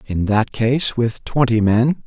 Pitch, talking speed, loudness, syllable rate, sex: 120 Hz, 175 wpm, -17 LUFS, 3.8 syllables/s, male